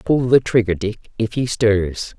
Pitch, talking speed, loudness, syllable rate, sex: 110 Hz, 190 wpm, -18 LUFS, 4.0 syllables/s, female